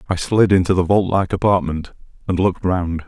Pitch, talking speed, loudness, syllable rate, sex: 95 Hz, 195 wpm, -18 LUFS, 5.6 syllables/s, male